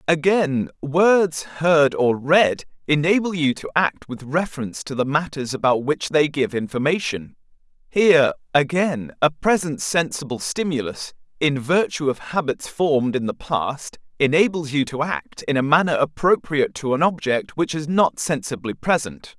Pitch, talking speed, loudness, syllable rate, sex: 150 Hz, 150 wpm, -20 LUFS, 4.6 syllables/s, male